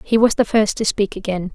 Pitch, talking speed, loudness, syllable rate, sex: 210 Hz, 270 wpm, -18 LUFS, 5.5 syllables/s, female